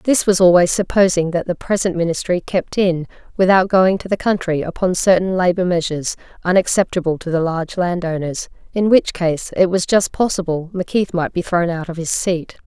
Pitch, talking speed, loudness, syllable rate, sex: 180 Hz, 190 wpm, -17 LUFS, 5.4 syllables/s, female